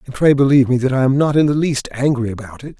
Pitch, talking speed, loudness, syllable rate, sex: 135 Hz, 300 wpm, -15 LUFS, 6.8 syllables/s, male